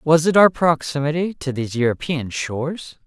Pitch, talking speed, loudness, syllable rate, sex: 150 Hz, 155 wpm, -19 LUFS, 5.0 syllables/s, male